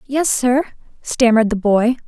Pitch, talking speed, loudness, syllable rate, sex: 240 Hz, 145 wpm, -16 LUFS, 4.6 syllables/s, female